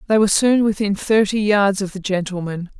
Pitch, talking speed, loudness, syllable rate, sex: 200 Hz, 195 wpm, -18 LUFS, 5.5 syllables/s, female